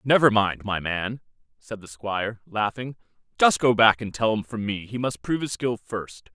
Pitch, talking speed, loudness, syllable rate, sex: 110 Hz, 210 wpm, -24 LUFS, 4.8 syllables/s, male